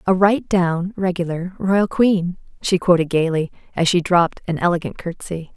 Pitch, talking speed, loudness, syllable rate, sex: 180 Hz, 160 wpm, -19 LUFS, 4.8 syllables/s, female